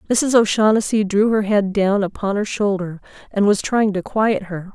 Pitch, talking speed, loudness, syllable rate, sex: 205 Hz, 190 wpm, -18 LUFS, 4.7 syllables/s, female